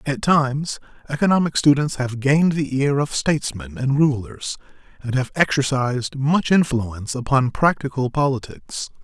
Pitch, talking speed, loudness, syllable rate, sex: 140 Hz, 135 wpm, -20 LUFS, 4.9 syllables/s, male